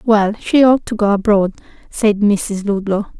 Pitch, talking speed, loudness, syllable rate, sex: 210 Hz, 170 wpm, -15 LUFS, 4.2 syllables/s, female